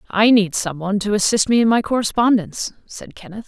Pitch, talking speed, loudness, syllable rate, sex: 210 Hz, 190 wpm, -17 LUFS, 6.0 syllables/s, female